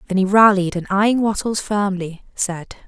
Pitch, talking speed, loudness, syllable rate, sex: 195 Hz, 165 wpm, -18 LUFS, 5.0 syllables/s, female